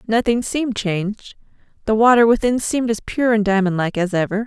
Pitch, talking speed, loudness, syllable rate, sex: 215 Hz, 190 wpm, -18 LUFS, 5.8 syllables/s, female